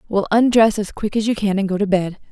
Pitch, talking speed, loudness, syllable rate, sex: 205 Hz, 285 wpm, -18 LUFS, 6.0 syllables/s, female